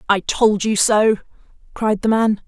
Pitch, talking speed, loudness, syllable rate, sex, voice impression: 210 Hz, 170 wpm, -17 LUFS, 4.0 syllables/s, female, feminine, adult-like, tensed, powerful, slightly soft, slightly raspy, intellectual, calm, reassuring, elegant, lively, slightly sharp